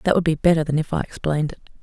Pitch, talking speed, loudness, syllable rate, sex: 160 Hz, 295 wpm, -21 LUFS, 8.1 syllables/s, female